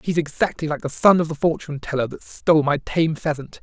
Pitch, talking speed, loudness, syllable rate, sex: 150 Hz, 230 wpm, -21 LUFS, 6.0 syllables/s, male